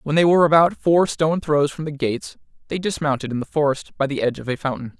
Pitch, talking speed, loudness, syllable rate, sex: 150 Hz, 250 wpm, -20 LUFS, 6.6 syllables/s, male